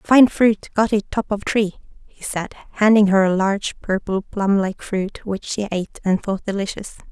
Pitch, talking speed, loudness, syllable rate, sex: 200 Hz, 195 wpm, -20 LUFS, 4.7 syllables/s, female